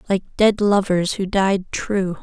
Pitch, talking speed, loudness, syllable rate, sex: 195 Hz, 160 wpm, -19 LUFS, 3.9 syllables/s, female